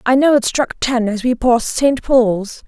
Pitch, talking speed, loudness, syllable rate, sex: 245 Hz, 225 wpm, -15 LUFS, 4.3 syllables/s, female